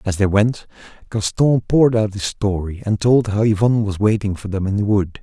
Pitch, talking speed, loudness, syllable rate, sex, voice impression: 105 Hz, 220 wpm, -18 LUFS, 5.3 syllables/s, male, very masculine, adult-like, soft, slightly muffled, sincere, very calm, slightly sweet